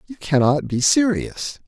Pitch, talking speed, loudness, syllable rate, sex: 165 Hz, 145 wpm, -19 LUFS, 4.1 syllables/s, male